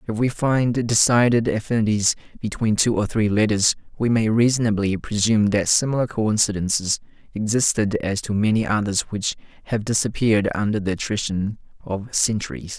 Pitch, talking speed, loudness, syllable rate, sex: 110 Hz, 140 wpm, -21 LUFS, 5.3 syllables/s, male